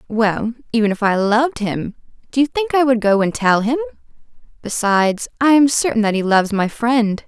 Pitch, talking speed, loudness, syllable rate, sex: 230 Hz, 200 wpm, -17 LUFS, 5.4 syllables/s, female